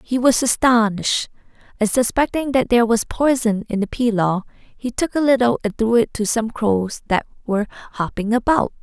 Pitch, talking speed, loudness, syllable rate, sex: 230 Hz, 175 wpm, -19 LUFS, 5.2 syllables/s, female